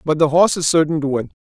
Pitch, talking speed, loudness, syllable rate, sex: 155 Hz, 295 wpm, -16 LUFS, 7.3 syllables/s, male